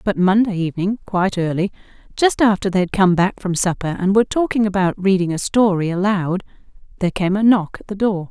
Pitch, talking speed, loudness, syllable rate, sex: 195 Hz, 200 wpm, -18 LUFS, 5.9 syllables/s, female